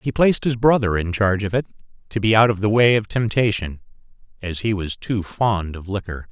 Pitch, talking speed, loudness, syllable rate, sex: 105 Hz, 220 wpm, -20 LUFS, 5.5 syllables/s, male